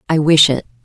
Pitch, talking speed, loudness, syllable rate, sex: 145 Hz, 215 wpm, -12 LUFS, 5.9 syllables/s, female